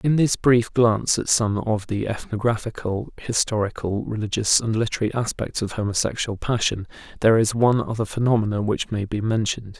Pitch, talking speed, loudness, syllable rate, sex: 110 Hz, 160 wpm, -22 LUFS, 5.6 syllables/s, male